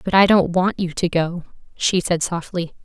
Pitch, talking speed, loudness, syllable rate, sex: 180 Hz, 210 wpm, -19 LUFS, 4.7 syllables/s, female